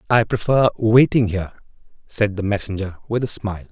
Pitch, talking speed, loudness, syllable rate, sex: 105 Hz, 160 wpm, -19 LUFS, 5.8 syllables/s, male